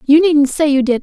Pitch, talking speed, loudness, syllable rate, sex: 290 Hz, 295 wpm, -13 LUFS, 5.3 syllables/s, female